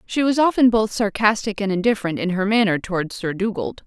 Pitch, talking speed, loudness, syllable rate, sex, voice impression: 205 Hz, 200 wpm, -20 LUFS, 5.9 syllables/s, female, very feminine, slightly young, slightly adult-like, thin, tensed, powerful, bright, hard, very clear, very fluent, slightly raspy, slightly cute, cool, intellectual, very refreshing, sincere, slightly calm, very friendly, reassuring, unique, elegant, slightly wild, slightly sweet, very lively, slightly strict, intense, slightly sharp